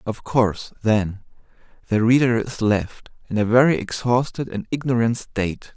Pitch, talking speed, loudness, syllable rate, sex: 115 Hz, 145 wpm, -21 LUFS, 4.7 syllables/s, male